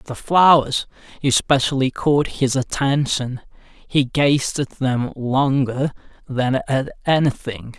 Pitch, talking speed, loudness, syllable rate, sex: 135 Hz, 110 wpm, -19 LUFS, 3.5 syllables/s, male